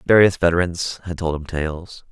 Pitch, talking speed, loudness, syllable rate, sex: 85 Hz, 170 wpm, -20 LUFS, 4.8 syllables/s, male